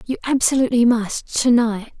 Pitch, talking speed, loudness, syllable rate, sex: 240 Hz, 120 wpm, -18 LUFS, 5.3 syllables/s, female